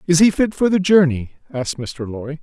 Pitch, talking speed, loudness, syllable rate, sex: 155 Hz, 225 wpm, -18 LUFS, 5.8 syllables/s, male